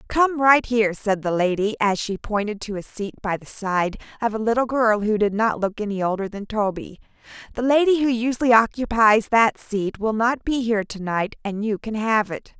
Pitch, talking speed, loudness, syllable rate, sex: 220 Hz, 215 wpm, -21 LUFS, 5.1 syllables/s, female